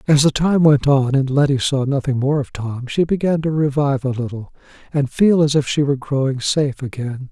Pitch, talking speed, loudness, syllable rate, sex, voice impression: 140 Hz, 220 wpm, -18 LUFS, 5.5 syllables/s, male, masculine, slightly old, soft, slightly refreshing, sincere, calm, elegant, slightly kind